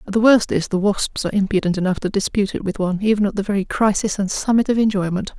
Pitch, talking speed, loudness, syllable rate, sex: 200 Hz, 245 wpm, -19 LUFS, 6.7 syllables/s, female